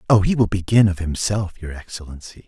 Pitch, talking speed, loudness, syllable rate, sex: 95 Hz, 195 wpm, -19 LUFS, 5.9 syllables/s, male